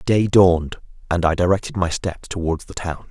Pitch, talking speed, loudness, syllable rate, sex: 90 Hz, 195 wpm, -20 LUFS, 5.2 syllables/s, male